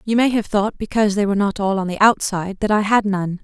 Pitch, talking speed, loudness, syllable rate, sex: 205 Hz, 280 wpm, -18 LUFS, 6.4 syllables/s, female